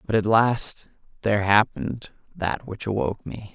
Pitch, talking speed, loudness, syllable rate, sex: 110 Hz, 150 wpm, -23 LUFS, 4.8 syllables/s, male